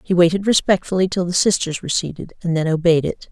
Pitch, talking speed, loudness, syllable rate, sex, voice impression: 175 Hz, 220 wpm, -18 LUFS, 6.4 syllables/s, female, feminine, middle-aged, tensed, slightly powerful, hard, clear, intellectual, calm, reassuring, elegant, sharp